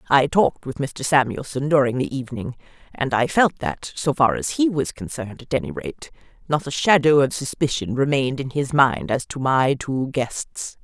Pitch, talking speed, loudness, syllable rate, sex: 135 Hz, 195 wpm, -21 LUFS, 5.0 syllables/s, female